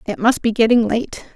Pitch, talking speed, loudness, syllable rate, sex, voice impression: 230 Hz, 220 wpm, -17 LUFS, 5.1 syllables/s, female, feminine, slightly gender-neutral, adult-like, slightly middle-aged, thin, slightly relaxed, slightly weak, slightly dark, slightly hard, muffled, slightly fluent, slightly cute, intellectual, refreshing, sincere, slightly calm, slightly reassuring, slightly elegant, slightly wild, slightly sweet, lively, slightly strict, slightly sharp